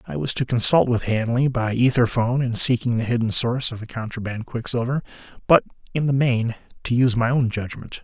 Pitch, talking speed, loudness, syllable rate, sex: 120 Hz, 200 wpm, -21 LUFS, 5.8 syllables/s, male